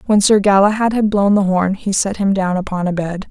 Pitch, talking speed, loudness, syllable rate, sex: 195 Hz, 255 wpm, -15 LUFS, 5.5 syllables/s, female